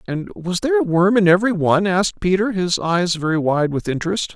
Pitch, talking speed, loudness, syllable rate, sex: 180 Hz, 220 wpm, -18 LUFS, 6.1 syllables/s, male